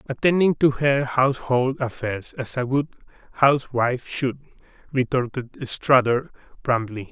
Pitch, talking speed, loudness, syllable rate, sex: 130 Hz, 110 wpm, -22 LUFS, 4.6 syllables/s, male